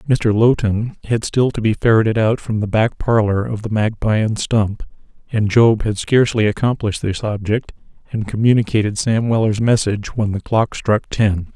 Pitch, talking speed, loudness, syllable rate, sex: 110 Hz, 175 wpm, -17 LUFS, 5.0 syllables/s, male